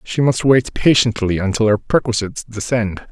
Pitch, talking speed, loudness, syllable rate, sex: 115 Hz, 155 wpm, -17 LUFS, 5.0 syllables/s, male